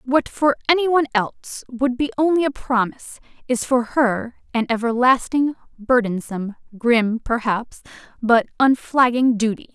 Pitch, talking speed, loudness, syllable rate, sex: 245 Hz, 130 wpm, -20 LUFS, 4.7 syllables/s, female